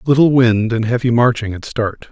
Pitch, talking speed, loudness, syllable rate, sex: 120 Hz, 200 wpm, -15 LUFS, 5.1 syllables/s, male